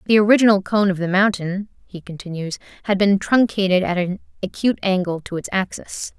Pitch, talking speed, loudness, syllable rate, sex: 190 Hz, 175 wpm, -19 LUFS, 5.6 syllables/s, female